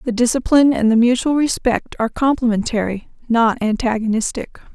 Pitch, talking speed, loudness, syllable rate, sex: 235 Hz, 125 wpm, -17 LUFS, 5.6 syllables/s, female